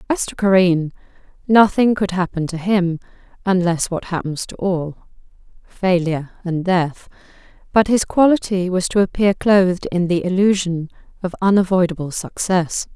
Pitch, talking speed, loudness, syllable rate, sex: 185 Hz, 130 wpm, -18 LUFS, 4.7 syllables/s, female